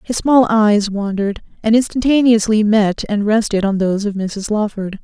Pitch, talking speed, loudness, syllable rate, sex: 215 Hz, 165 wpm, -15 LUFS, 4.9 syllables/s, female